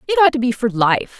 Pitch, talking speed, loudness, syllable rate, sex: 255 Hz, 300 wpm, -16 LUFS, 5.9 syllables/s, female